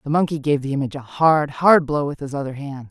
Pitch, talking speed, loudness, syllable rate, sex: 145 Hz, 270 wpm, -20 LUFS, 6.1 syllables/s, female